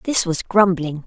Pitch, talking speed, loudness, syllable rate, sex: 185 Hz, 170 wpm, -18 LUFS, 4.3 syllables/s, female